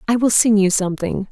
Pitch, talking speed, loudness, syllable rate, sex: 205 Hz, 230 wpm, -16 LUFS, 6.1 syllables/s, female